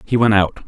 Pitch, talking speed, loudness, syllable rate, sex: 105 Hz, 265 wpm, -15 LUFS, 5.8 syllables/s, male